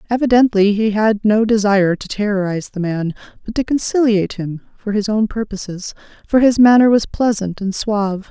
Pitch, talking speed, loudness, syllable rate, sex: 210 Hz, 175 wpm, -16 LUFS, 5.6 syllables/s, female